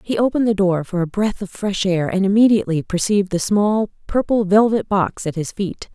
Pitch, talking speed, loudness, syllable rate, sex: 195 Hz, 210 wpm, -18 LUFS, 5.5 syllables/s, female